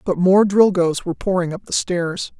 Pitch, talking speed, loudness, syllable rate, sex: 180 Hz, 200 wpm, -18 LUFS, 5.0 syllables/s, female